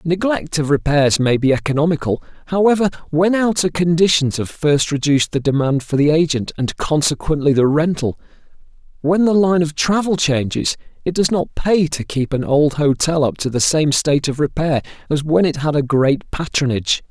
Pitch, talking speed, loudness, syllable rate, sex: 150 Hz, 180 wpm, -17 LUFS, 5.2 syllables/s, male